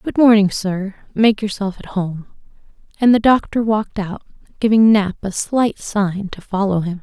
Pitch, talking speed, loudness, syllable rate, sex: 205 Hz, 170 wpm, -17 LUFS, 4.6 syllables/s, female